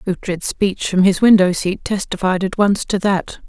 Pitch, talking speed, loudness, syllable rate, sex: 190 Hz, 190 wpm, -17 LUFS, 4.6 syllables/s, female